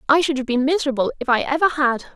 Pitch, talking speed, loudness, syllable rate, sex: 285 Hz, 250 wpm, -19 LUFS, 7.2 syllables/s, female